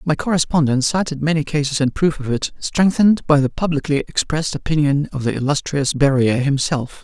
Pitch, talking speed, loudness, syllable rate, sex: 145 Hz, 170 wpm, -18 LUFS, 5.6 syllables/s, male